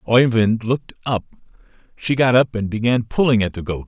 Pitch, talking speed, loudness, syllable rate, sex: 115 Hz, 185 wpm, -19 LUFS, 5.4 syllables/s, male